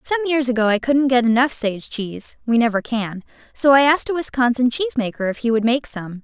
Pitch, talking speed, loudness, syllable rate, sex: 245 Hz, 220 wpm, -19 LUFS, 6.4 syllables/s, female